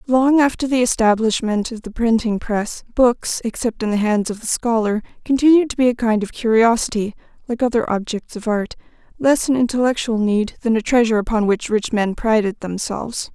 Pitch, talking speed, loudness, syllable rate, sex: 230 Hz, 185 wpm, -18 LUFS, 5.4 syllables/s, female